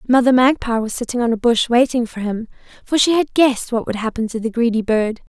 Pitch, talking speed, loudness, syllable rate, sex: 240 Hz, 235 wpm, -18 LUFS, 5.9 syllables/s, female